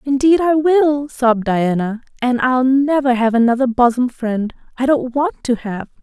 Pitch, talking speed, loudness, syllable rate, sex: 250 Hz, 160 wpm, -16 LUFS, 4.5 syllables/s, female